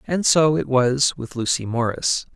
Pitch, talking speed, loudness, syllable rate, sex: 135 Hz, 180 wpm, -20 LUFS, 4.3 syllables/s, male